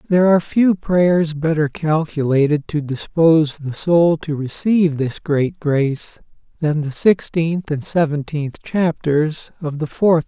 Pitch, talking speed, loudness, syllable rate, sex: 160 Hz, 140 wpm, -18 LUFS, 4.1 syllables/s, male